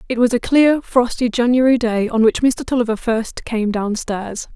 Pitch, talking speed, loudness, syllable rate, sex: 235 Hz, 185 wpm, -17 LUFS, 4.6 syllables/s, female